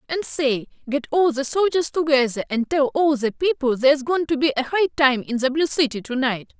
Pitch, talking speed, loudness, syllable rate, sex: 280 Hz, 230 wpm, -21 LUFS, 5.2 syllables/s, female